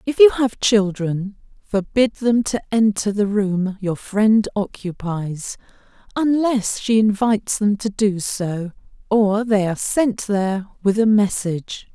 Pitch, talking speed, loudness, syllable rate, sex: 210 Hz, 140 wpm, -19 LUFS, 3.9 syllables/s, female